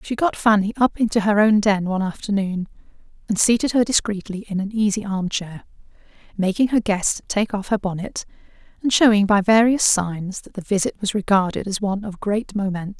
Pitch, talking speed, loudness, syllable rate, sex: 205 Hz, 190 wpm, -20 LUFS, 5.4 syllables/s, female